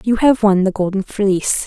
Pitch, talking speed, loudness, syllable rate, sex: 205 Hz, 215 wpm, -16 LUFS, 5.1 syllables/s, female